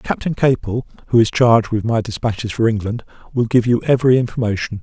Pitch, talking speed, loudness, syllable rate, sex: 115 Hz, 185 wpm, -17 LUFS, 6.1 syllables/s, male